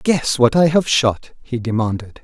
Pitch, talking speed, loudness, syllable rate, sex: 130 Hz, 190 wpm, -17 LUFS, 4.4 syllables/s, male